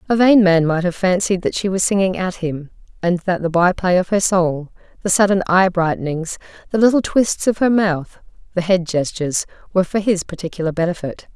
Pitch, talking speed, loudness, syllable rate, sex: 185 Hz, 195 wpm, -18 LUFS, 5.5 syllables/s, female